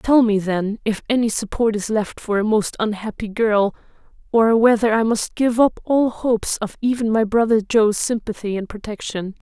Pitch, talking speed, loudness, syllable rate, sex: 220 Hz, 185 wpm, -19 LUFS, 4.8 syllables/s, female